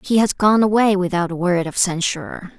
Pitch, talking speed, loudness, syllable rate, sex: 190 Hz, 210 wpm, -18 LUFS, 5.3 syllables/s, female